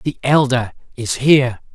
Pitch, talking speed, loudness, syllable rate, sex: 130 Hz, 140 wpm, -16 LUFS, 4.4 syllables/s, male